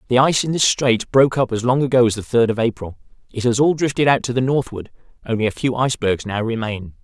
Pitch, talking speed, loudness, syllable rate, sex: 120 Hz, 245 wpm, -18 LUFS, 6.4 syllables/s, male